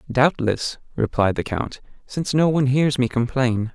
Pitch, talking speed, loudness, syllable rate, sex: 130 Hz, 160 wpm, -21 LUFS, 4.7 syllables/s, male